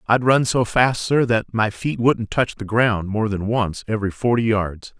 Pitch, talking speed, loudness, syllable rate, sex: 110 Hz, 215 wpm, -20 LUFS, 4.4 syllables/s, male